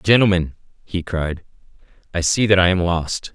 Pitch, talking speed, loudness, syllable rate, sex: 90 Hz, 160 wpm, -19 LUFS, 4.7 syllables/s, male